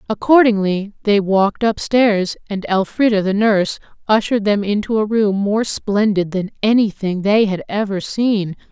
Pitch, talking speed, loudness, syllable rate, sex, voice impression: 205 Hz, 145 wpm, -17 LUFS, 4.7 syllables/s, female, feminine, adult-like, slightly clear, intellectual, slightly calm, slightly sharp